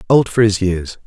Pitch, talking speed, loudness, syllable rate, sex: 105 Hz, 225 wpm, -16 LUFS, 4.9 syllables/s, male